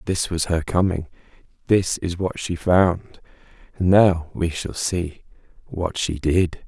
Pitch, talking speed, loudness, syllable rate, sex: 85 Hz, 145 wpm, -21 LUFS, 3.5 syllables/s, male